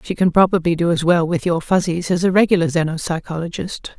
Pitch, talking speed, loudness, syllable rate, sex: 170 Hz, 210 wpm, -18 LUFS, 6.0 syllables/s, female